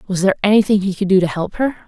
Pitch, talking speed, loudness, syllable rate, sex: 195 Hz, 285 wpm, -16 LUFS, 7.7 syllables/s, female